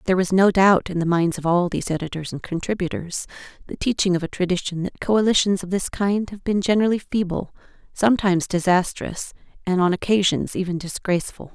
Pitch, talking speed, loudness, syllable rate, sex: 185 Hz, 175 wpm, -21 LUFS, 6.1 syllables/s, female